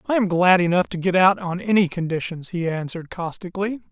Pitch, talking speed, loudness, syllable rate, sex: 180 Hz, 200 wpm, -21 LUFS, 6.0 syllables/s, male